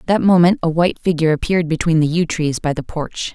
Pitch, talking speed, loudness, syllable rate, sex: 165 Hz, 235 wpm, -17 LUFS, 6.4 syllables/s, female